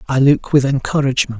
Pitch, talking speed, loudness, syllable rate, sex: 135 Hz, 170 wpm, -15 LUFS, 6.4 syllables/s, male